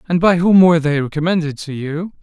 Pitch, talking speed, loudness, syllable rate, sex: 165 Hz, 215 wpm, -15 LUFS, 5.9 syllables/s, male